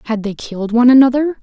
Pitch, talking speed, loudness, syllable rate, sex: 240 Hz, 210 wpm, -12 LUFS, 7.2 syllables/s, female